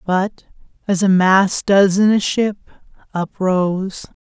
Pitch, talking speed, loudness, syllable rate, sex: 190 Hz, 125 wpm, -16 LUFS, 3.7 syllables/s, female